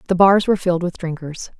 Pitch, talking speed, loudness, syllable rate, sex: 180 Hz, 225 wpm, -18 LUFS, 6.6 syllables/s, female